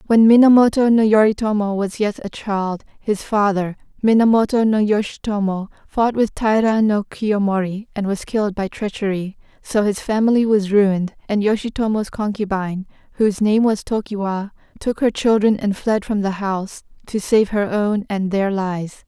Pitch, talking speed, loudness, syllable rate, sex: 210 Hz, 155 wpm, -18 LUFS, 4.9 syllables/s, female